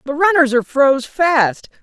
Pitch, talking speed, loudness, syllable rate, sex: 280 Hz, 165 wpm, -15 LUFS, 5.1 syllables/s, female